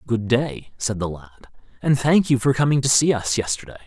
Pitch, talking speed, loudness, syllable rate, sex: 120 Hz, 215 wpm, -20 LUFS, 5.6 syllables/s, male